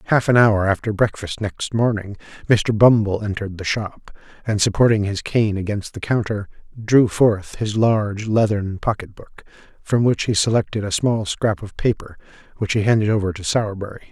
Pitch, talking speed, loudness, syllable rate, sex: 105 Hz, 175 wpm, -19 LUFS, 5.1 syllables/s, male